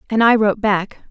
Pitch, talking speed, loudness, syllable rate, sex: 210 Hz, 215 wpm, -16 LUFS, 6.0 syllables/s, female